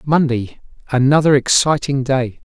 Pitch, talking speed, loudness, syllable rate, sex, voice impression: 135 Hz, 70 wpm, -16 LUFS, 4.5 syllables/s, male, very masculine, middle-aged, very thick, tensed, slightly powerful, bright, slightly soft, clear, fluent, slightly raspy, slightly cool, intellectual, refreshing, slightly sincere, calm, slightly mature, friendly, reassuring, slightly unique, slightly elegant, wild, slightly sweet, lively, kind, slightly intense